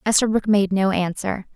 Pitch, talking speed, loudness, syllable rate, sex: 195 Hz, 155 wpm, -20 LUFS, 5.2 syllables/s, female